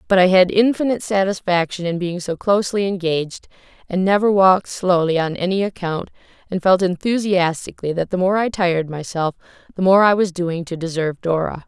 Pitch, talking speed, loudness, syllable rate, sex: 185 Hz, 175 wpm, -18 LUFS, 5.7 syllables/s, female